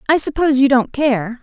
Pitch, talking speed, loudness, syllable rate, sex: 265 Hz, 210 wpm, -15 LUFS, 5.7 syllables/s, female